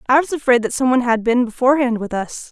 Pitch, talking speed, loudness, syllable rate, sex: 250 Hz, 260 wpm, -17 LUFS, 6.9 syllables/s, female